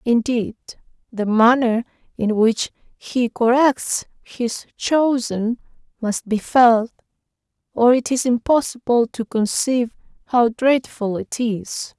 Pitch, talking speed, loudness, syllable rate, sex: 235 Hz, 110 wpm, -19 LUFS, 3.5 syllables/s, female